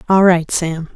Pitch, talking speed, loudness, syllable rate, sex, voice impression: 175 Hz, 190 wpm, -15 LUFS, 4.2 syllables/s, female, feminine, adult-like, tensed, bright, fluent, slightly raspy, intellectual, elegant, lively, slightly strict, sharp